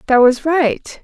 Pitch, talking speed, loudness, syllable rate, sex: 280 Hz, 175 wpm, -14 LUFS, 3.5 syllables/s, female